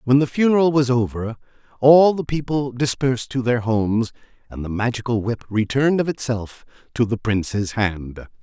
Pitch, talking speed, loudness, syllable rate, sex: 125 Hz, 165 wpm, -20 LUFS, 5.2 syllables/s, male